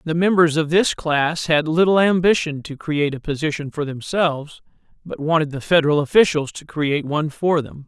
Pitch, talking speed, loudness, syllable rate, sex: 155 Hz, 185 wpm, -19 LUFS, 5.5 syllables/s, male